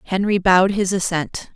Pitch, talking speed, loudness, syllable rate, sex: 190 Hz, 155 wpm, -18 LUFS, 5.0 syllables/s, female